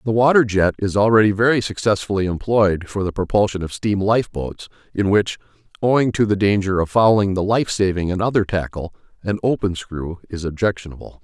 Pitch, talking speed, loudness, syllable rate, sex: 100 Hz, 175 wpm, -19 LUFS, 5.6 syllables/s, male